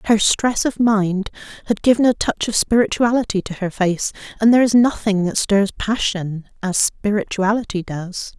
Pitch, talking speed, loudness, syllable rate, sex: 210 Hz, 165 wpm, -18 LUFS, 4.7 syllables/s, female